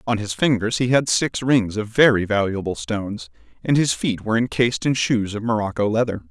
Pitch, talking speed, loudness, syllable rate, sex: 110 Hz, 200 wpm, -20 LUFS, 5.5 syllables/s, male